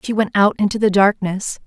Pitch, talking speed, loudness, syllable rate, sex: 205 Hz, 215 wpm, -17 LUFS, 5.4 syllables/s, female